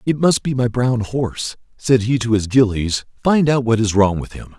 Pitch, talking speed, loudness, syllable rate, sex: 120 Hz, 235 wpm, -18 LUFS, 4.8 syllables/s, male